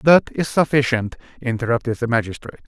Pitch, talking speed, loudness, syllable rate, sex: 125 Hz, 135 wpm, -20 LUFS, 6.3 syllables/s, male